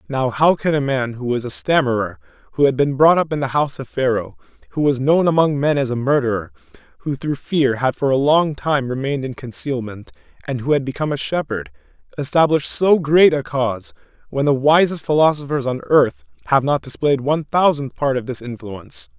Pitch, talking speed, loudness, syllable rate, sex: 140 Hz, 200 wpm, -18 LUFS, 5.6 syllables/s, male